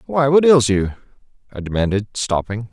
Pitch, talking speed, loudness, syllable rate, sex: 115 Hz, 155 wpm, -17 LUFS, 5.3 syllables/s, male